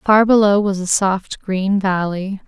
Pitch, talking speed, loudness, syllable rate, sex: 195 Hz, 170 wpm, -17 LUFS, 3.8 syllables/s, female